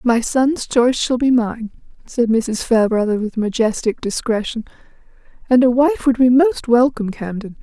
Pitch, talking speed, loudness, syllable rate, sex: 240 Hz, 155 wpm, -17 LUFS, 4.9 syllables/s, female